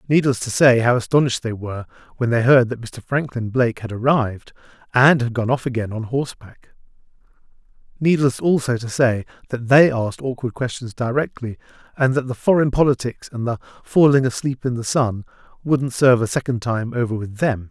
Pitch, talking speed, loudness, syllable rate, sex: 125 Hz, 180 wpm, -19 LUFS, 5.6 syllables/s, male